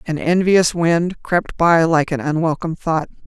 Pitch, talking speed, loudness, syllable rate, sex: 165 Hz, 165 wpm, -17 LUFS, 4.4 syllables/s, female